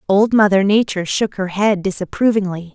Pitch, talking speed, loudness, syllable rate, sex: 195 Hz, 155 wpm, -16 LUFS, 5.5 syllables/s, female